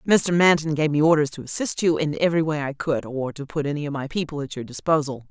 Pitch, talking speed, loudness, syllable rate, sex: 150 Hz, 260 wpm, -22 LUFS, 6.3 syllables/s, female